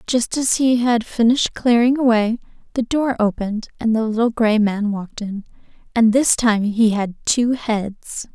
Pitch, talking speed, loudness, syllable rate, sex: 225 Hz, 175 wpm, -18 LUFS, 4.5 syllables/s, female